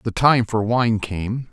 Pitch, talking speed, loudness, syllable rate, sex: 110 Hz, 195 wpm, -19 LUFS, 3.4 syllables/s, male